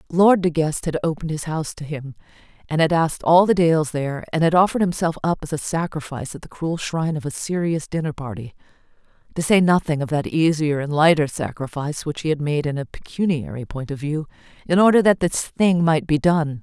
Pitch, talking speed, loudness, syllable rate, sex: 155 Hz, 215 wpm, -21 LUFS, 5.9 syllables/s, female